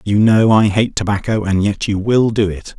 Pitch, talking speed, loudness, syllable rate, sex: 105 Hz, 235 wpm, -15 LUFS, 4.9 syllables/s, male